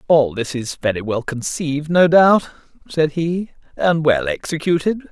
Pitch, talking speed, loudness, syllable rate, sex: 155 Hz, 155 wpm, -18 LUFS, 4.4 syllables/s, male